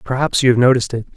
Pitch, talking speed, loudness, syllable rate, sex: 125 Hz, 260 wpm, -15 LUFS, 8.2 syllables/s, male